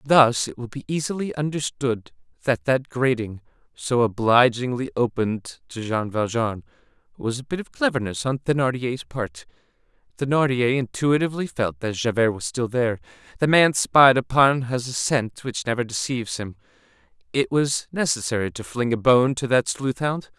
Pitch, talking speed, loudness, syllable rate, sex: 125 Hz, 155 wpm, -22 LUFS, 4.9 syllables/s, male